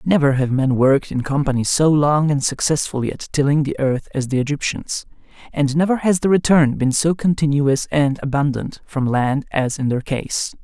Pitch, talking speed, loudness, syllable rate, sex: 145 Hz, 185 wpm, -18 LUFS, 5.0 syllables/s, male